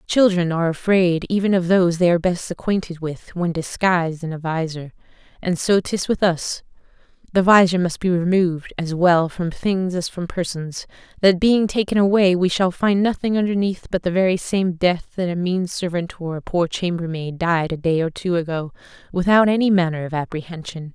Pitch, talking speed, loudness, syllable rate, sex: 175 Hz, 190 wpm, -20 LUFS, 5.2 syllables/s, female